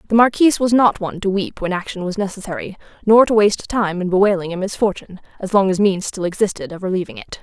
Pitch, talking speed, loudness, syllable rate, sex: 195 Hz, 225 wpm, -18 LUFS, 6.6 syllables/s, female